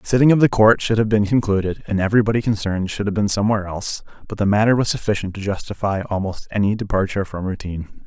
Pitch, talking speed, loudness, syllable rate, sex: 100 Hz, 215 wpm, -19 LUFS, 7.0 syllables/s, male